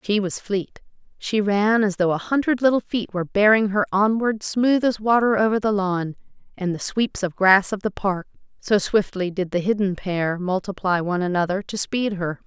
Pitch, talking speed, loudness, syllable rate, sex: 200 Hz, 195 wpm, -21 LUFS, 4.9 syllables/s, female